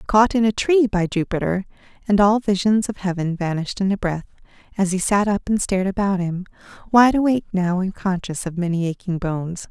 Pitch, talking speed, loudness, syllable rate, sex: 195 Hz, 200 wpm, -20 LUFS, 5.7 syllables/s, female